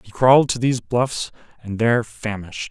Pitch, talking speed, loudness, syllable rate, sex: 115 Hz, 175 wpm, -19 LUFS, 5.5 syllables/s, male